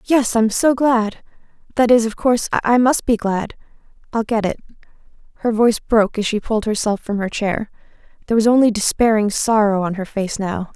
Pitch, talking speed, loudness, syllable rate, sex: 220 Hz, 185 wpm, -18 LUFS, 5.4 syllables/s, female